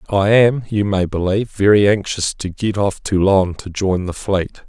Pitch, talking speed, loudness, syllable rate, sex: 100 Hz, 190 wpm, -17 LUFS, 4.6 syllables/s, male